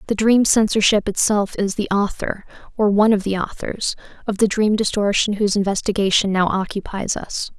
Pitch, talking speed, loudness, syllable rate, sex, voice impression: 205 Hz, 165 wpm, -19 LUFS, 5.4 syllables/s, female, feminine, young, tensed, bright, clear, fluent, cute, calm, friendly, slightly sweet, sharp